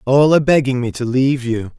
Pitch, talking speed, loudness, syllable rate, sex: 130 Hz, 235 wpm, -16 LUFS, 5.5 syllables/s, male